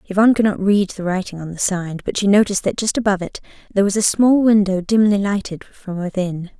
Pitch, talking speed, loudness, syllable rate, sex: 195 Hz, 230 wpm, -18 LUFS, 6.2 syllables/s, female